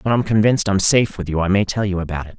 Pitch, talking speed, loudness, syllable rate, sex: 100 Hz, 325 wpm, -18 LUFS, 7.4 syllables/s, male